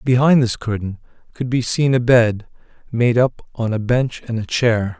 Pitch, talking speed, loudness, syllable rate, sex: 120 Hz, 190 wpm, -18 LUFS, 4.6 syllables/s, male